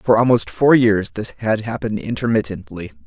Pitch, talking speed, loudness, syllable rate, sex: 110 Hz, 155 wpm, -18 LUFS, 5.3 syllables/s, male